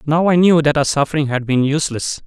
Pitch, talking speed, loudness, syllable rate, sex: 150 Hz, 240 wpm, -16 LUFS, 6.1 syllables/s, male